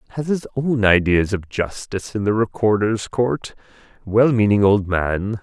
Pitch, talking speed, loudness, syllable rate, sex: 105 Hz, 145 wpm, -19 LUFS, 4.6 syllables/s, male